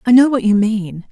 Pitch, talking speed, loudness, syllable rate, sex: 220 Hz, 270 wpm, -14 LUFS, 5.1 syllables/s, female